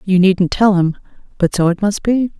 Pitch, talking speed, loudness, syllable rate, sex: 190 Hz, 225 wpm, -15 LUFS, 4.8 syllables/s, female